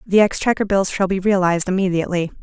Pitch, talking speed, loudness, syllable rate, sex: 190 Hz, 175 wpm, -18 LUFS, 6.8 syllables/s, female